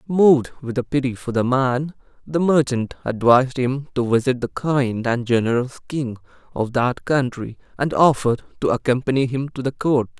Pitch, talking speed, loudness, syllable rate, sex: 130 Hz, 165 wpm, -20 LUFS, 4.9 syllables/s, male